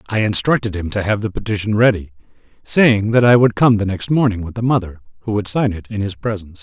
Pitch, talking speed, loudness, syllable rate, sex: 105 Hz, 235 wpm, -17 LUFS, 6.1 syllables/s, male